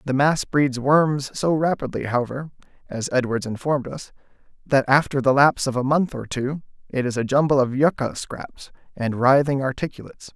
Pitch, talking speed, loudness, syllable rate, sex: 135 Hz, 175 wpm, -21 LUFS, 5.3 syllables/s, male